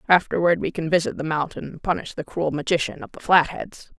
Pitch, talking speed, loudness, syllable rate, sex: 165 Hz, 210 wpm, -22 LUFS, 5.9 syllables/s, female